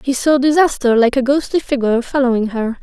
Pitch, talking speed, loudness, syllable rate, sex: 260 Hz, 190 wpm, -15 LUFS, 5.9 syllables/s, female